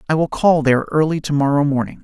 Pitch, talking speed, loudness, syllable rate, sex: 150 Hz, 235 wpm, -17 LUFS, 6.7 syllables/s, male